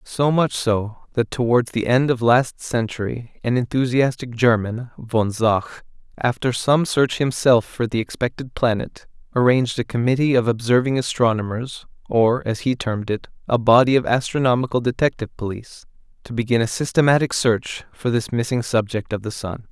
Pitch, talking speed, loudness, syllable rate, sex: 120 Hz, 160 wpm, -20 LUFS, 5.1 syllables/s, male